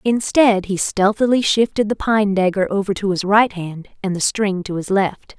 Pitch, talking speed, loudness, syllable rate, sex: 200 Hz, 200 wpm, -18 LUFS, 4.7 syllables/s, female